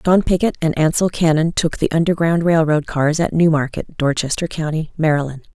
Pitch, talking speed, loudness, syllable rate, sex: 160 Hz, 185 wpm, -17 LUFS, 5.4 syllables/s, female